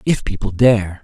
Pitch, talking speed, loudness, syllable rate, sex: 105 Hz, 175 wpm, -16 LUFS, 4.4 syllables/s, male